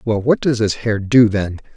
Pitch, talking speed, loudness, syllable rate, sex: 110 Hz, 240 wpm, -16 LUFS, 4.6 syllables/s, male